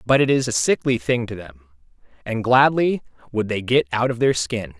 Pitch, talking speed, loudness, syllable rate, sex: 115 Hz, 215 wpm, -20 LUFS, 5.0 syllables/s, male